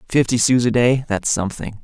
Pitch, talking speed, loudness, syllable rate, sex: 115 Hz, 195 wpm, -18 LUFS, 5.6 syllables/s, male